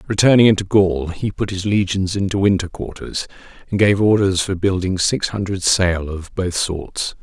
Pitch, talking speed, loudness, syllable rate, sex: 95 Hz, 175 wpm, -18 LUFS, 4.7 syllables/s, male